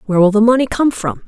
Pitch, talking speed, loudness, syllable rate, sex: 225 Hz, 280 wpm, -14 LUFS, 7.1 syllables/s, female